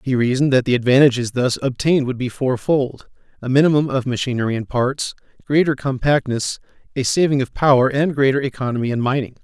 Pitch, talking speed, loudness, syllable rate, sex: 130 Hz, 170 wpm, -18 LUFS, 6.1 syllables/s, male